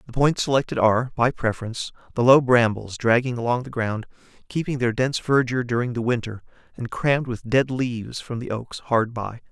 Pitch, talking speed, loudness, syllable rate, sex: 120 Hz, 190 wpm, -22 LUFS, 5.7 syllables/s, male